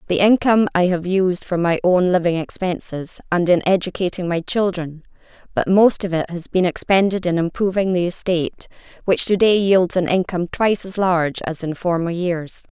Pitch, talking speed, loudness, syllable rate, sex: 180 Hz, 180 wpm, -19 LUFS, 5.2 syllables/s, female